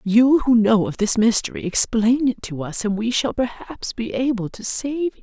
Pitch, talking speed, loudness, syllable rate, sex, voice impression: 225 Hz, 220 wpm, -20 LUFS, 4.8 syllables/s, female, feminine, middle-aged, tensed, powerful, fluent, raspy, slightly friendly, unique, elegant, slightly wild, lively, intense